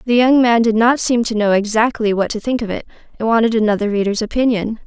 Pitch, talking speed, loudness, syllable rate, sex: 225 Hz, 235 wpm, -16 LUFS, 6.2 syllables/s, female